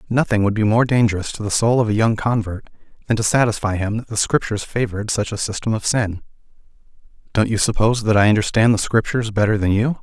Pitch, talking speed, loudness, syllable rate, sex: 110 Hz, 215 wpm, -19 LUFS, 6.5 syllables/s, male